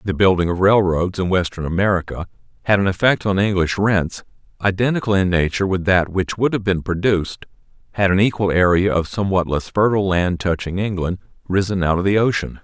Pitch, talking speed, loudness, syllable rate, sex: 95 Hz, 185 wpm, -18 LUFS, 5.8 syllables/s, male